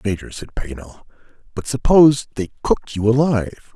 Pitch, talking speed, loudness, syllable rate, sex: 115 Hz, 145 wpm, -17 LUFS, 6.0 syllables/s, male